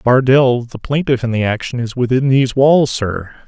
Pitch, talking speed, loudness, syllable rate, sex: 125 Hz, 190 wpm, -15 LUFS, 4.9 syllables/s, male